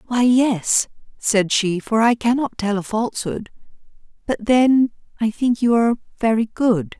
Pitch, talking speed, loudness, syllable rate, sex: 225 Hz, 155 wpm, -19 LUFS, 4.4 syllables/s, female